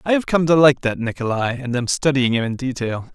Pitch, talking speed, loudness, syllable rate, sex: 130 Hz, 250 wpm, -19 LUFS, 5.8 syllables/s, male